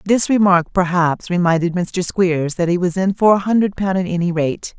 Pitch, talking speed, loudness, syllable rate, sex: 180 Hz, 215 wpm, -17 LUFS, 5.0 syllables/s, female